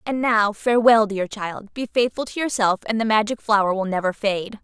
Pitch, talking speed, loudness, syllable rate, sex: 215 Hz, 205 wpm, -21 LUFS, 5.3 syllables/s, female